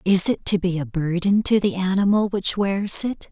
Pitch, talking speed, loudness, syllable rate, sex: 195 Hz, 215 wpm, -21 LUFS, 4.7 syllables/s, female